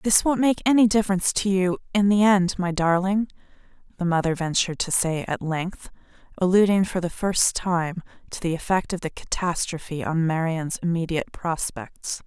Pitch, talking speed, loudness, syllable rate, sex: 180 Hz, 160 wpm, -23 LUFS, 5.0 syllables/s, female